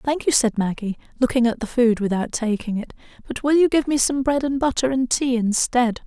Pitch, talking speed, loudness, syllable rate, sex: 245 Hz, 225 wpm, -21 LUFS, 5.4 syllables/s, female